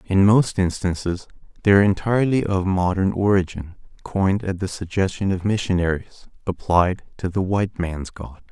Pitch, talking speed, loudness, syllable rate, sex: 95 Hz, 150 wpm, -21 LUFS, 5.3 syllables/s, male